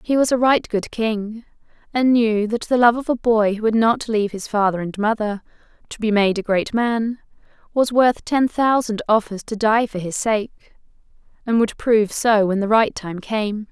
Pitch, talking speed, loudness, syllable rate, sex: 220 Hz, 205 wpm, -19 LUFS, 4.7 syllables/s, female